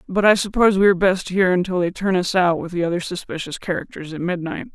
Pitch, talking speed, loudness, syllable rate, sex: 185 Hz, 240 wpm, -20 LUFS, 6.6 syllables/s, female